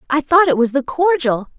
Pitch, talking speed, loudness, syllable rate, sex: 290 Hz, 225 wpm, -15 LUFS, 5.3 syllables/s, female